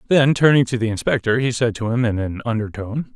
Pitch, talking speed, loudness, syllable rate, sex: 120 Hz, 230 wpm, -19 LUFS, 6.2 syllables/s, male